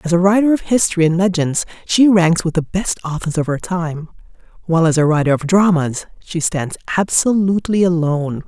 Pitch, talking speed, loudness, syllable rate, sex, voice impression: 175 Hz, 185 wpm, -16 LUFS, 5.5 syllables/s, female, very feminine, very adult-like, slightly old, slightly thin, slightly tensed, powerful, slightly dark, very soft, clear, fluent, slightly raspy, cute, slightly cool, very intellectual, slightly refreshing, very sincere, very calm, very friendly, very reassuring, very unique, very elegant, very sweet, slightly lively, kind, slightly intense